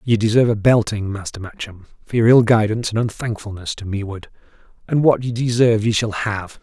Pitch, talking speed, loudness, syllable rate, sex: 110 Hz, 190 wpm, -18 LUFS, 5.9 syllables/s, male